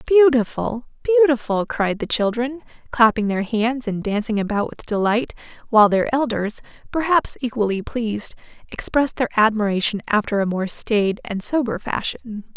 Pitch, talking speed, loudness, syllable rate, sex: 230 Hz, 140 wpm, -20 LUFS, 4.8 syllables/s, female